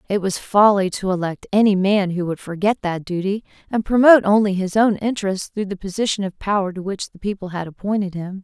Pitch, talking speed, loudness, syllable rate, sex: 195 Hz, 215 wpm, -19 LUFS, 5.8 syllables/s, female